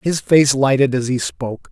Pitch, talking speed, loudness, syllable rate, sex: 130 Hz, 210 wpm, -16 LUFS, 5.0 syllables/s, male